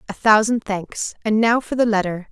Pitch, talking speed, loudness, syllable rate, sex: 215 Hz, 180 wpm, -19 LUFS, 5.0 syllables/s, female